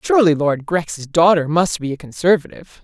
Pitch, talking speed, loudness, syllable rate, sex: 165 Hz, 170 wpm, -17 LUFS, 5.5 syllables/s, female